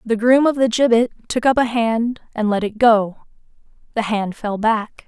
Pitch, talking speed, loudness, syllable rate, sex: 230 Hz, 200 wpm, -18 LUFS, 4.7 syllables/s, female